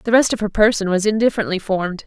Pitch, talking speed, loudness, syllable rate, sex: 205 Hz, 235 wpm, -18 LUFS, 7.2 syllables/s, female